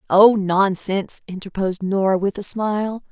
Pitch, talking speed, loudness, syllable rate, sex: 195 Hz, 135 wpm, -20 LUFS, 5.0 syllables/s, female